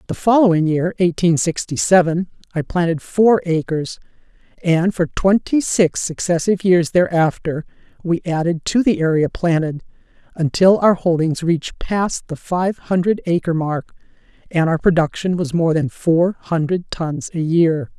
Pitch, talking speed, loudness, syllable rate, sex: 170 Hz, 145 wpm, -18 LUFS, 4.3 syllables/s, female